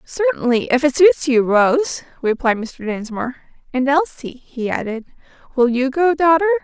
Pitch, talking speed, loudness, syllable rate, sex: 275 Hz, 155 wpm, -17 LUFS, 4.7 syllables/s, female